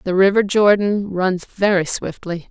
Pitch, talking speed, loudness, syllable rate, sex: 190 Hz, 145 wpm, -17 LUFS, 4.2 syllables/s, female